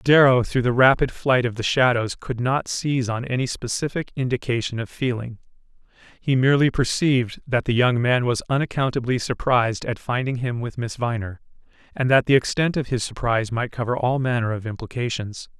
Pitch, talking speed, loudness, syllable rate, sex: 125 Hz, 175 wpm, -22 LUFS, 5.5 syllables/s, male